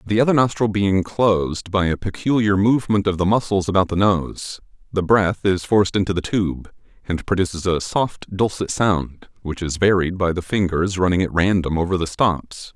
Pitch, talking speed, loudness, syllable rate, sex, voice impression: 95 Hz, 190 wpm, -20 LUFS, 5.0 syllables/s, male, masculine, adult-like, slightly thick, cool, slightly intellectual, slightly refreshing, slightly calm